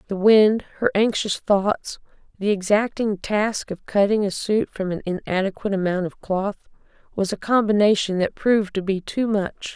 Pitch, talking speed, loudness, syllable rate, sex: 200 Hz, 165 wpm, -21 LUFS, 4.8 syllables/s, female